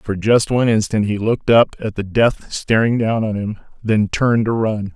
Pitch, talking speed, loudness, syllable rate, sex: 110 Hz, 220 wpm, -17 LUFS, 5.1 syllables/s, male